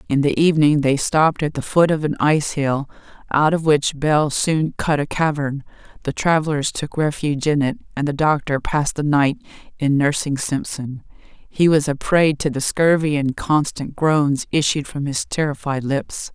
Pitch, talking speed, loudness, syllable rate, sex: 150 Hz, 185 wpm, -19 LUFS, 4.7 syllables/s, female